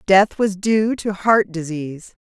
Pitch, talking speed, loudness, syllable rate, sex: 195 Hz, 160 wpm, -19 LUFS, 4.0 syllables/s, female